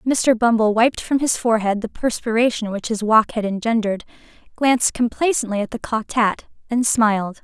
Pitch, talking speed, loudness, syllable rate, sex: 225 Hz, 170 wpm, -19 LUFS, 5.5 syllables/s, female